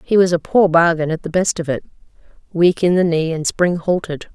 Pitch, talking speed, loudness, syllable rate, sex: 170 Hz, 220 wpm, -17 LUFS, 5.3 syllables/s, female